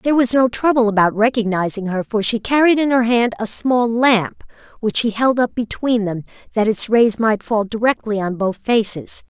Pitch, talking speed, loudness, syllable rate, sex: 225 Hz, 200 wpm, -17 LUFS, 4.9 syllables/s, female